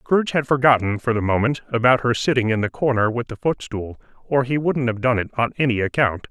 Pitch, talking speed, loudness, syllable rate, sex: 120 Hz, 230 wpm, -20 LUFS, 5.8 syllables/s, male